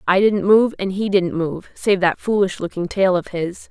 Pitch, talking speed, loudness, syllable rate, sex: 190 Hz, 225 wpm, -19 LUFS, 4.6 syllables/s, female